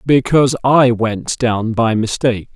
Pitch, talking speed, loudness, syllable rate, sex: 120 Hz, 140 wpm, -15 LUFS, 4.3 syllables/s, male